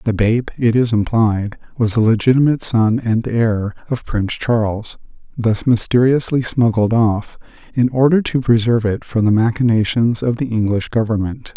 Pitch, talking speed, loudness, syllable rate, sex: 115 Hz, 155 wpm, -16 LUFS, 4.8 syllables/s, male